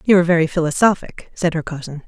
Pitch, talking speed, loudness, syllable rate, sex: 170 Hz, 175 wpm, -18 LUFS, 6.2 syllables/s, female